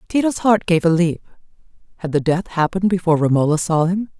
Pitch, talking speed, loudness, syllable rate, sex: 175 Hz, 170 wpm, -18 LUFS, 6.3 syllables/s, female